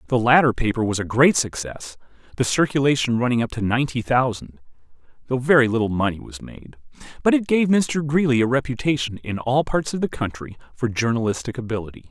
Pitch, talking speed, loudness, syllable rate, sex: 125 Hz, 180 wpm, -21 LUFS, 5.9 syllables/s, male